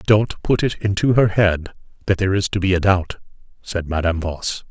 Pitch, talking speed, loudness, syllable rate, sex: 95 Hz, 205 wpm, -19 LUFS, 5.3 syllables/s, male